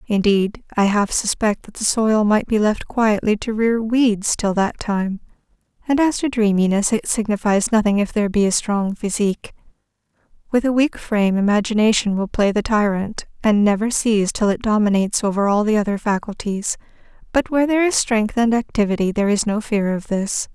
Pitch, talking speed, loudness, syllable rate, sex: 215 Hz, 185 wpm, -19 LUFS, 5.3 syllables/s, female